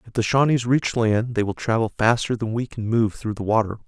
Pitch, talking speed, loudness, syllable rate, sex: 115 Hz, 250 wpm, -22 LUFS, 5.5 syllables/s, male